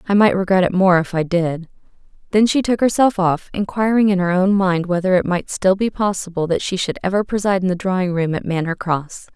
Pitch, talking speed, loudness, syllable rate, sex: 185 Hz, 230 wpm, -18 LUFS, 5.7 syllables/s, female